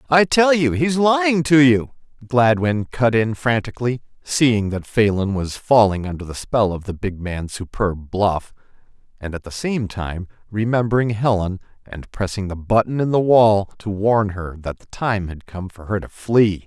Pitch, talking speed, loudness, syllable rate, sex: 110 Hz, 185 wpm, -19 LUFS, 4.5 syllables/s, male